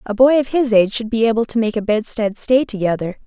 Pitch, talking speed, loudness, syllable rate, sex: 225 Hz, 255 wpm, -17 LUFS, 6.2 syllables/s, female